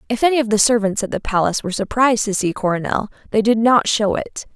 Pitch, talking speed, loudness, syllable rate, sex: 215 Hz, 235 wpm, -18 LUFS, 6.6 syllables/s, female